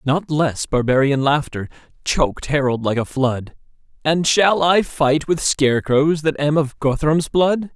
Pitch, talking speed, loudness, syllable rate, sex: 145 Hz, 155 wpm, -18 LUFS, 4.1 syllables/s, male